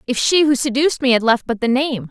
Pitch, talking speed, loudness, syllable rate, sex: 260 Hz, 285 wpm, -16 LUFS, 6.2 syllables/s, female